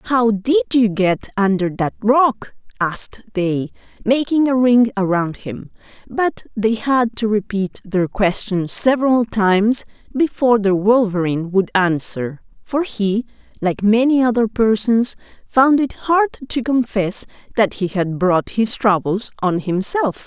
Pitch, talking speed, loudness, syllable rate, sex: 220 Hz, 140 wpm, -18 LUFS, 3.9 syllables/s, female